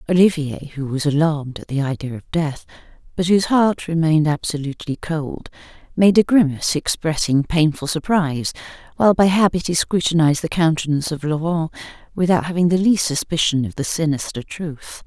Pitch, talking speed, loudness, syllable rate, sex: 160 Hz, 155 wpm, -19 LUFS, 5.6 syllables/s, female